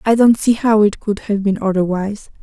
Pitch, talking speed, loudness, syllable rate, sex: 210 Hz, 225 wpm, -16 LUFS, 5.5 syllables/s, female